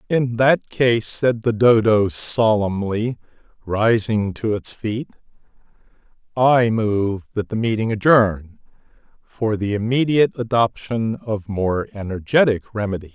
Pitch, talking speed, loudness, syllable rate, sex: 110 Hz, 115 wpm, -19 LUFS, 3.9 syllables/s, male